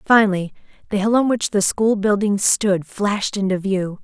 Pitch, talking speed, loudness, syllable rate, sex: 200 Hz, 180 wpm, -19 LUFS, 4.8 syllables/s, female